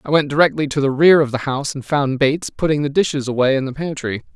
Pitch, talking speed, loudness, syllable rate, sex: 140 Hz, 260 wpm, -18 LUFS, 6.5 syllables/s, male